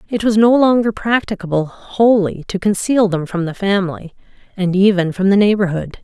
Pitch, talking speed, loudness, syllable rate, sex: 195 Hz, 170 wpm, -15 LUFS, 5.2 syllables/s, female